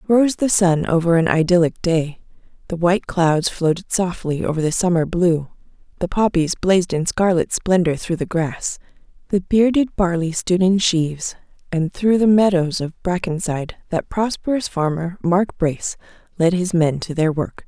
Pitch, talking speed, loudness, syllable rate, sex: 175 Hz, 165 wpm, -19 LUFS, 4.8 syllables/s, female